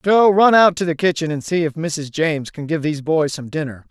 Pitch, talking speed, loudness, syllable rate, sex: 160 Hz, 260 wpm, -18 LUFS, 5.4 syllables/s, male